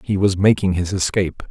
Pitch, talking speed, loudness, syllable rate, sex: 95 Hz, 200 wpm, -18 LUFS, 5.7 syllables/s, male